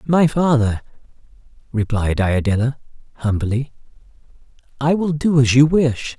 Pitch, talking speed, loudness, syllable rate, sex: 130 Hz, 105 wpm, -18 LUFS, 4.6 syllables/s, male